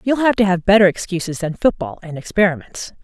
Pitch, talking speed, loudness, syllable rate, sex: 190 Hz, 200 wpm, -17 LUFS, 6.0 syllables/s, female